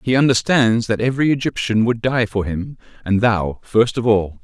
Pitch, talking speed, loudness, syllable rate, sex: 115 Hz, 190 wpm, -18 LUFS, 5.0 syllables/s, male